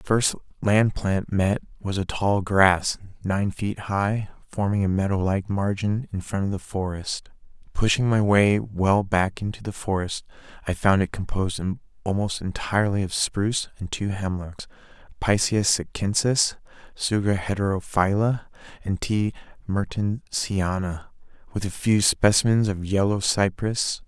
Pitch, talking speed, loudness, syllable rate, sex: 100 Hz, 135 wpm, -24 LUFS, 4.1 syllables/s, male